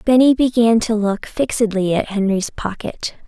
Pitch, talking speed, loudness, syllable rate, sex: 220 Hz, 145 wpm, -18 LUFS, 4.5 syllables/s, female